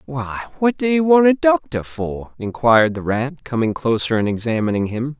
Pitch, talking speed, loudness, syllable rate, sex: 130 Hz, 185 wpm, -18 LUFS, 5.0 syllables/s, male